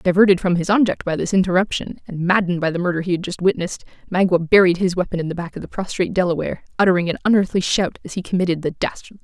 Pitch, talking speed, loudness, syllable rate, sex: 180 Hz, 240 wpm, -19 LUFS, 7.5 syllables/s, female